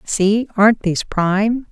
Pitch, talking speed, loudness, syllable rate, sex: 210 Hz, 105 wpm, -16 LUFS, 4.6 syllables/s, female